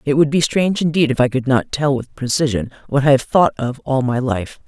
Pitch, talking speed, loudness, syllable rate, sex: 135 Hz, 255 wpm, -17 LUFS, 5.6 syllables/s, female